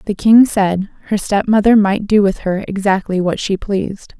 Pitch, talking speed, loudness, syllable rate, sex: 200 Hz, 185 wpm, -15 LUFS, 4.8 syllables/s, female